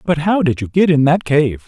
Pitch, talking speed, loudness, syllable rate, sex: 155 Hz, 285 wpm, -15 LUFS, 5.2 syllables/s, male